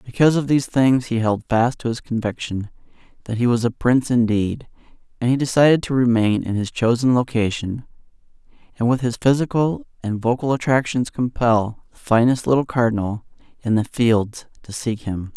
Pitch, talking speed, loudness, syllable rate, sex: 120 Hz, 170 wpm, -20 LUFS, 5.2 syllables/s, male